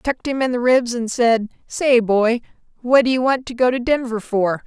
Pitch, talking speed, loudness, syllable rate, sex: 240 Hz, 230 wpm, -18 LUFS, 5.0 syllables/s, female